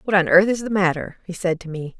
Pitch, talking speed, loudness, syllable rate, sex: 185 Hz, 300 wpm, -19 LUFS, 6.0 syllables/s, female